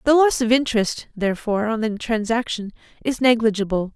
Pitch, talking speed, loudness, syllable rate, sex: 225 Hz, 150 wpm, -21 LUFS, 5.8 syllables/s, female